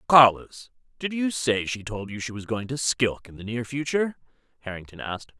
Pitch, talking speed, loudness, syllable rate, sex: 120 Hz, 200 wpm, -25 LUFS, 5.4 syllables/s, male